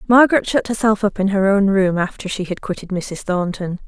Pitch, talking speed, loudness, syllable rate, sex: 195 Hz, 215 wpm, -18 LUFS, 5.5 syllables/s, female